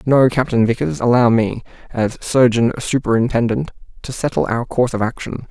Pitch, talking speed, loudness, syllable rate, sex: 120 Hz, 155 wpm, -17 LUFS, 5.3 syllables/s, male